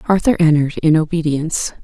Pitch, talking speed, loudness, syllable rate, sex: 160 Hz, 130 wpm, -16 LUFS, 6.3 syllables/s, female